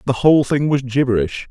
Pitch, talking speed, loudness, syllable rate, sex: 130 Hz, 200 wpm, -16 LUFS, 6.0 syllables/s, male